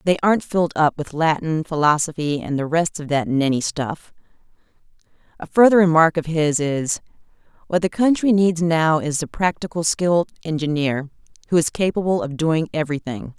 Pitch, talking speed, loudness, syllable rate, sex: 160 Hz, 160 wpm, -20 LUFS, 5.3 syllables/s, female